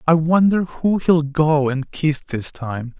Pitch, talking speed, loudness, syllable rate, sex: 155 Hz, 180 wpm, -19 LUFS, 3.7 syllables/s, male